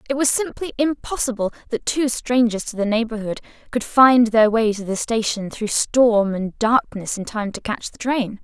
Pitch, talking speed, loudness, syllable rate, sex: 230 Hz, 190 wpm, -20 LUFS, 4.7 syllables/s, female